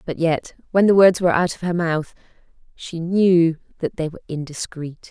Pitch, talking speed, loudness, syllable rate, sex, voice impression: 170 Hz, 190 wpm, -20 LUFS, 5.0 syllables/s, female, very feminine, very adult-like, slightly intellectual, elegant